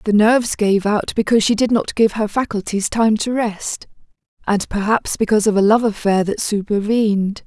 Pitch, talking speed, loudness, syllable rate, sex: 215 Hz, 185 wpm, -17 LUFS, 5.2 syllables/s, female